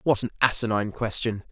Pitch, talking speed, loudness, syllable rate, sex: 110 Hz, 160 wpm, -25 LUFS, 6.4 syllables/s, male